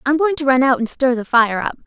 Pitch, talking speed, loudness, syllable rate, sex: 265 Hz, 320 wpm, -16 LUFS, 5.9 syllables/s, female